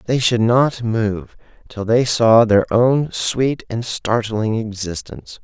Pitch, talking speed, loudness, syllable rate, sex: 115 Hz, 145 wpm, -17 LUFS, 3.5 syllables/s, male